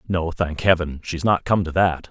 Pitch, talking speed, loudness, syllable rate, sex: 85 Hz, 230 wpm, -21 LUFS, 4.7 syllables/s, male